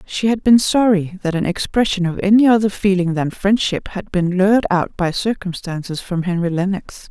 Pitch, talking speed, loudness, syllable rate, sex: 190 Hz, 185 wpm, -17 LUFS, 5.1 syllables/s, female